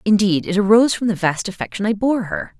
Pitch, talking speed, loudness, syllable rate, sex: 195 Hz, 230 wpm, -18 LUFS, 6.1 syllables/s, female